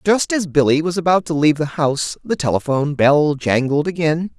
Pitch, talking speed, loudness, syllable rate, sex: 155 Hz, 190 wpm, -17 LUFS, 5.5 syllables/s, male